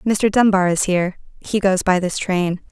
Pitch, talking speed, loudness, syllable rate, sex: 190 Hz, 200 wpm, -18 LUFS, 4.9 syllables/s, female